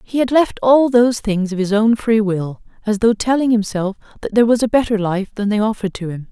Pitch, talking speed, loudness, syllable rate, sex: 215 Hz, 245 wpm, -16 LUFS, 5.9 syllables/s, female